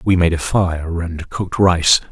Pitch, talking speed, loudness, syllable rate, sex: 85 Hz, 200 wpm, -17 LUFS, 4.1 syllables/s, male